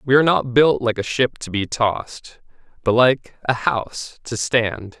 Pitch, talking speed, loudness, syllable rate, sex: 120 Hz, 190 wpm, -19 LUFS, 4.4 syllables/s, male